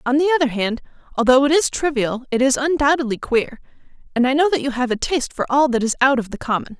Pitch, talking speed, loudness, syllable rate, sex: 265 Hz, 245 wpm, -18 LUFS, 6.5 syllables/s, female